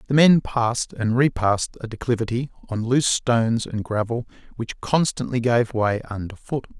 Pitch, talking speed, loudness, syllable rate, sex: 120 Hz, 160 wpm, -22 LUFS, 5.0 syllables/s, male